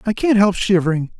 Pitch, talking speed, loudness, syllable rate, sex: 195 Hz, 200 wpm, -16 LUFS, 5.9 syllables/s, male